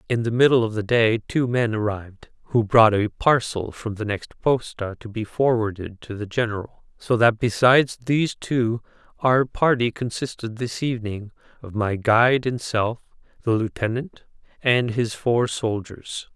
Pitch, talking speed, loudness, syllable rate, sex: 115 Hz, 160 wpm, -22 LUFS, 4.5 syllables/s, male